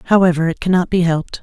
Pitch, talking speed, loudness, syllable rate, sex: 175 Hz, 210 wpm, -16 LUFS, 7.3 syllables/s, female